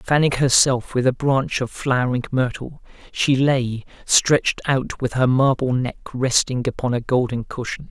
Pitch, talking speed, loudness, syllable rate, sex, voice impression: 130 Hz, 160 wpm, -20 LUFS, 4.4 syllables/s, male, masculine, adult-like, slightly middle-aged, thick, tensed, slightly powerful, slightly bright, hard, clear, fluent, slightly cool, intellectual, slightly refreshing, sincere, very calm, slightly mature, slightly friendly, slightly reassuring, unique, slightly wild, lively, slightly strict, slightly intense, slightly sharp